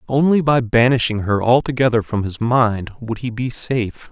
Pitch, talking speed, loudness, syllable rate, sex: 120 Hz, 175 wpm, -18 LUFS, 4.9 syllables/s, male